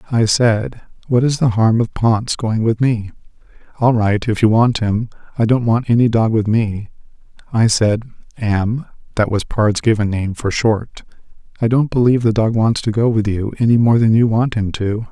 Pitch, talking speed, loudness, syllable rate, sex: 115 Hz, 200 wpm, -16 LUFS, 4.4 syllables/s, male